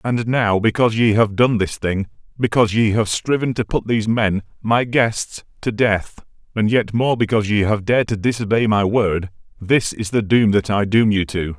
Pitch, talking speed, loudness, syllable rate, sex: 110 Hz, 205 wpm, -18 LUFS, 5.0 syllables/s, male